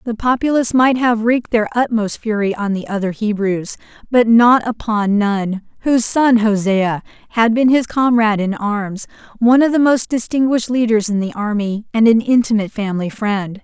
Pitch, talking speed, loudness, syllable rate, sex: 220 Hz, 170 wpm, -16 LUFS, 5.2 syllables/s, female